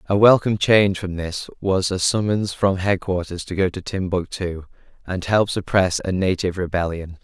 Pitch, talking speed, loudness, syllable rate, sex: 95 Hz, 165 wpm, -21 LUFS, 5.0 syllables/s, male